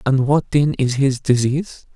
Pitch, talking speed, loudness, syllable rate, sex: 135 Hz, 185 wpm, -18 LUFS, 4.6 syllables/s, male